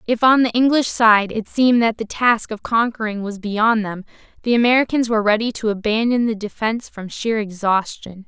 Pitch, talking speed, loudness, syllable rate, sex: 220 Hz, 190 wpm, -18 LUFS, 5.3 syllables/s, female